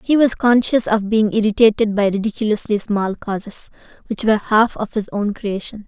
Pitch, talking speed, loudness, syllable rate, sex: 215 Hz, 175 wpm, -18 LUFS, 5.2 syllables/s, female